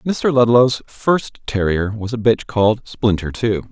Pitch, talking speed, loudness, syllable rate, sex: 115 Hz, 160 wpm, -17 LUFS, 4.0 syllables/s, male